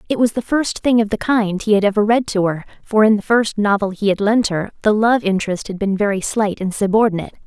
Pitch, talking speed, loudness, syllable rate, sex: 210 Hz, 255 wpm, -17 LUFS, 6.0 syllables/s, female